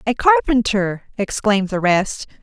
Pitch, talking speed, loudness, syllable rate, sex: 215 Hz, 125 wpm, -18 LUFS, 4.4 syllables/s, female